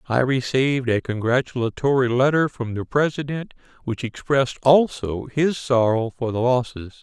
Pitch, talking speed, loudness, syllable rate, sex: 125 Hz, 135 wpm, -21 LUFS, 4.9 syllables/s, male